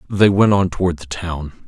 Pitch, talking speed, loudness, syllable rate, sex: 90 Hz, 215 wpm, -17 LUFS, 4.8 syllables/s, male